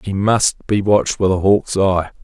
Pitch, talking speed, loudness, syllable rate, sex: 95 Hz, 215 wpm, -16 LUFS, 4.8 syllables/s, male